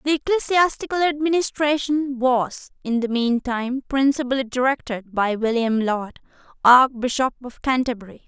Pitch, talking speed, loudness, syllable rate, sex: 255 Hz, 110 wpm, -21 LUFS, 4.8 syllables/s, female